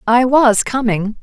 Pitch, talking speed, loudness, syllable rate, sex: 235 Hz, 145 wpm, -14 LUFS, 3.7 syllables/s, female